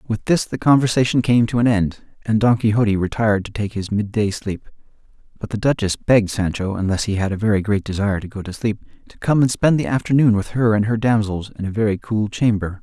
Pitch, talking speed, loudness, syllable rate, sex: 110 Hz, 230 wpm, -19 LUFS, 5.9 syllables/s, male